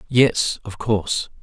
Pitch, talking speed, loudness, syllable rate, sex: 105 Hz, 125 wpm, -20 LUFS, 3.6 syllables/s, male